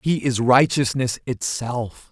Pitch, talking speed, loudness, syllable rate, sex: 125 Hz, 115 wpm, -21 LUFS, 3.6 syllables/s, male